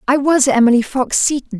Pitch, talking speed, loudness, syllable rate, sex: 260 Hz, 190 wpm, -14 LUFS, 5.3 syllables/s, female